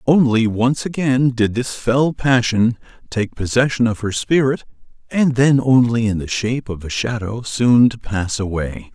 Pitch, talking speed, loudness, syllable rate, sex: 120 Hz, 170 wpm, -18 LUFS, 4.4 syllables/s, male